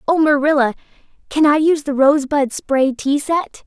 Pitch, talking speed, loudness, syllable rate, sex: 290 Hz, 165 wpm, -16 LUFS, 5.1 syllables/s, female